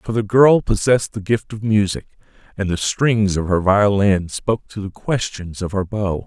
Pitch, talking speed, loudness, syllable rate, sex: 100 Hz, 200 wpm, -18 LUFS, 4.7 syllables/s, male